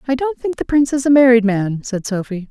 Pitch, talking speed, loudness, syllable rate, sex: 235 Hz, 265 wpm, -16 LUFS, 6.0 syllables/s, female